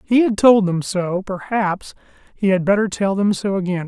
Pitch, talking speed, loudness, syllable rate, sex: 195 Hz, 185 wpm, -18 LUFS, 4.8 syllables/s, male